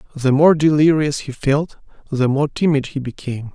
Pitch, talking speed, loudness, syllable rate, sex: 145 Hz, 170 wpm, -17 LUFS, 5.1 syllables/s, male